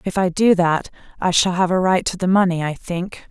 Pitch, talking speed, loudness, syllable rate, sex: 180 Hz, 255 wpm, -18 LUFS, 5.1 syllables/s, female